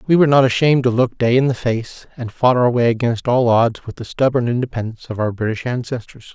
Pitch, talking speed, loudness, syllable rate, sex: 120 Hz, 235 wpm, -17 LUFS, 6.1 syllables/s, male